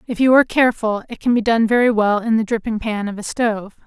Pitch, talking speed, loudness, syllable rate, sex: 225 Hz, 265 wpm, -17 LUFS, 6.4 syllables/s, female